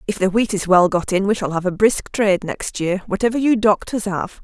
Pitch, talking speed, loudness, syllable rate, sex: 200 Hz, 255 wpm, -18 LUFS, 5.4 syllables/s, female